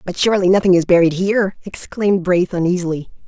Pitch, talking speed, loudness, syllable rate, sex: 185 Hz, 165 wpm, -16 LUFS, 6.4 syllables/s, female